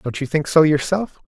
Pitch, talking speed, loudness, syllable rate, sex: 155 Hz, 235 wpm, -18 LUFS, 5.1 syllables/s, male